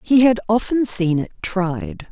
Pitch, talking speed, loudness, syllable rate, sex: 195 Hz, 170 wpm, -18 LUFS, 3.9 syllables/s, female